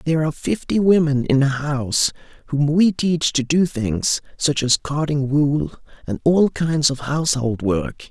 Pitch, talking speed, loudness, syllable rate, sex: 145 Hz, 170 wpm, -19 LUFS, 4.4 syllables/s, male